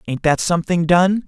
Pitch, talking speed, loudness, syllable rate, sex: 170 Hz, 190 wpm, -17 LUFS, 5.4 syllables/s, male